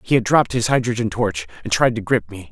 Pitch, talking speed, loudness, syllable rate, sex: 110 Hz, 265 wpm, -19 LUFS, 6.3 syllables/s, male